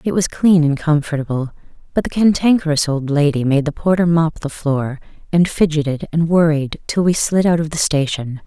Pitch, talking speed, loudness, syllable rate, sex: 155 Hz, 190 wpm, -17 LUFS, 5.2 syllables/s, female